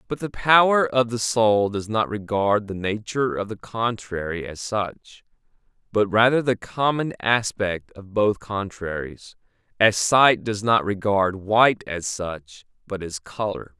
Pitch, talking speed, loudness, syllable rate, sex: 105 Hz, 150 wpm, -22 LUFS, 4.0 syllables/s, male